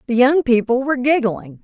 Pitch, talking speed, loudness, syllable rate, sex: 250 Hz, 185 wpm, -17 LUFS, 5.5 syllables/s, female